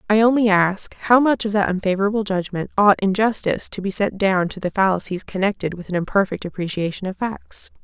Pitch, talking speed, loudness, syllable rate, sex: 200 Hz, 190 wpm, -20 LUFS, 5.8 syllables/s, female